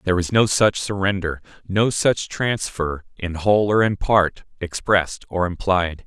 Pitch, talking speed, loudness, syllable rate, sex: 95 Hz, 160 wpm, -20 LUFS, 4.4 syllables/s, male